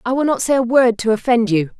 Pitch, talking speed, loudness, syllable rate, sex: 235 Hz, 300 wpm, -16 LUFS, 6.1 syllables/s, female